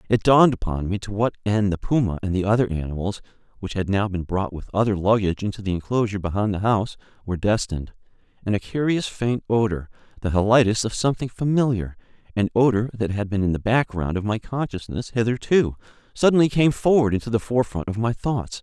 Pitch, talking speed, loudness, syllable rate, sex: 105 Hz, 185 wpm, -22 LUFS, 6.2 syllables/s, male